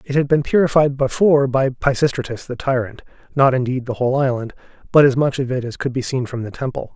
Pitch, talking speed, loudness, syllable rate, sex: 130 Hz, 225 wpm, -18 LUFS, 6.2 syllables/s, male